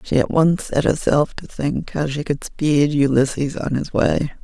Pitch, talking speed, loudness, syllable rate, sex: 145 Hz, 205 wpm, -19 LUFS, 4.3 syllables/s, female